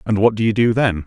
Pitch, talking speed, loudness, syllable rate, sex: 110 Hz, 335 wpm, -17 LUFS, 6.3 syllables/s, male